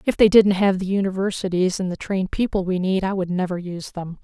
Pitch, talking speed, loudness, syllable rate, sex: 190 Hz, 240 wpm, -21 LUFS, 6.1 syllables/s, female